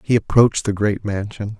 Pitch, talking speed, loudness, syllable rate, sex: 105 Hz, 190 wpm, -19 LUFS, 5.4 syllables/s, male